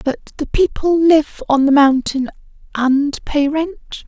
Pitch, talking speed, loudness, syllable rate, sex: 295 Hz, 145 wpm, -16 LUFS, 3.5 syllables/s, female